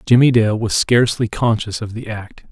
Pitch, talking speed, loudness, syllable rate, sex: 110 Hz, 190 wpm, -17 LUFS, 5.0 syllables/s, male